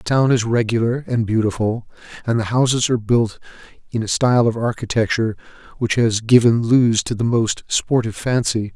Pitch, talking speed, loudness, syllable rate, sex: 115 Hz, 170 wpm, -18 LUFS, 5.6 syllables/s, male